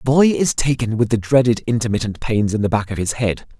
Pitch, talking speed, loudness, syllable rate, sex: 115 Hz, 250 wpm, -18 LUFS, 6.0 syllables/s, male